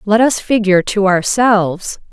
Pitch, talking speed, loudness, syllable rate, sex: 205 Hz, 140 wpm, -13 LUFS, 4.7 syllables/s, female